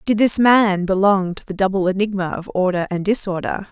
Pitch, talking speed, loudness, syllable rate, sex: 195 Hz, 195 wpm, -18 LUFS, 5.3 syllables/s, female